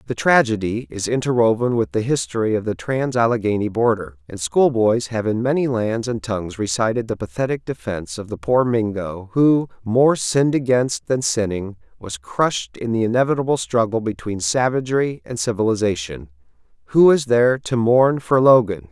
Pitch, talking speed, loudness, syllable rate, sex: 115 Hz, 160 wpm, -19 LUFS, 5.2 syllables/s, male